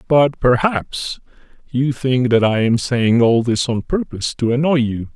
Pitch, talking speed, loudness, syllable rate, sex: 125 Hz, 175 wpm, -17 LUFS, 4.2 syllables/s, male